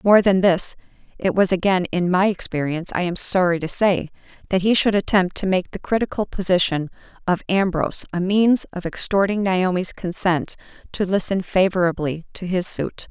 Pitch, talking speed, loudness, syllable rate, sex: 185 Hz, 170 wpm, -20 LUFS, 5.1 syllables/s, female